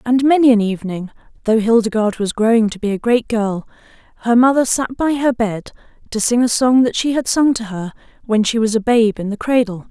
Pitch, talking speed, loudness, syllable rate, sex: 230 Hz, 225 wpm, -16 LUFS, 5.6 syllables/s, female